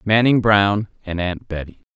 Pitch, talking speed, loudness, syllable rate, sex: 100 Hz, 155 wpm, -18 LUFS, 4.5 syllables/s, male